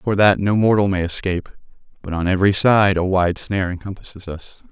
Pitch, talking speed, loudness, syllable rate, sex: 95 Hz, 190 wpm, -18 LUFS, 5.8 syllables/s, male